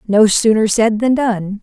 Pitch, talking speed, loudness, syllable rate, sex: 215 Hz, 185 wpm, -14 LUFS, 4.0 syllables/s, female